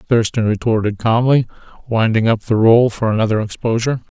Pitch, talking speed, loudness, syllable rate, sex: 115 Hz, 145 wpm, -16 LUFS, 5.7 syllables/s, male